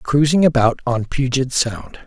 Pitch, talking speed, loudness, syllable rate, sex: 130 Hz, 145 wpm, -17 LUFS, 4.2 syllables/s, male